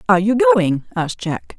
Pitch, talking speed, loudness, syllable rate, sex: 220 Hz, 190 wpm, -17 LUFS, 6.1 syllables/s, female